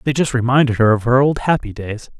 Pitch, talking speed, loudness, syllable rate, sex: 125 Hz, 245 wpm, -16 LUFS, 5.9 syllables/s, male